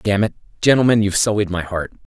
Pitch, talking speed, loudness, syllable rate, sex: 105 Hz, 195 wpm, -18 LUFS, 6.4 syllables/s, male